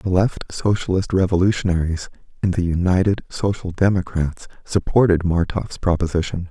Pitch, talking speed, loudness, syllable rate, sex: 90 Hz, 110 wpm, -20 LUFS, 5.1 syllables/s, male